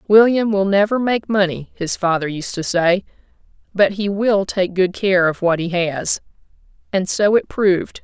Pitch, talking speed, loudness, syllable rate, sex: 190 Hz, 180 wpm, -18 LUFS, 4.5 syllables/s, female